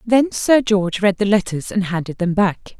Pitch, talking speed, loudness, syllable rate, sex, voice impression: 200 Hz, 215 wpm, -18 LUFS, 4.8 syllables/s, female, feminine, very adult-like, slightly powerful, slightly fluent, intellectual, slightly strict